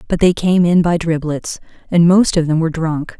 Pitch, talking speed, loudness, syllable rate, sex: 165 Hz, 225 wpm, -15 LUFS, 5.2 syllables/s, female